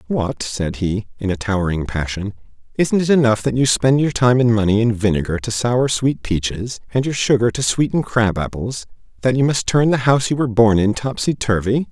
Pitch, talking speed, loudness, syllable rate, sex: 115 Hz, 210 wpm, -18 LUFS, 5.3 syllables/s, male